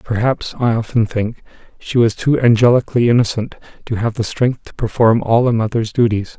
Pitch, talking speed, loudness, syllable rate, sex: 115 Hz, 180 wpm, -16 LUFS, 5.3 syllables/s, male